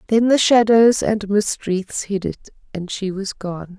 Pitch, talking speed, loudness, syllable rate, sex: 205 Hz, 190 wpm, -18 LUFS, 3.9 syllables/s, female